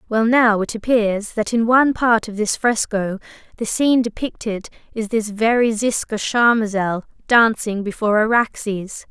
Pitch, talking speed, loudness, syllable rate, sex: 220 Hz, 145 wpm, -18 LUFS, 4.6 syllables/s, female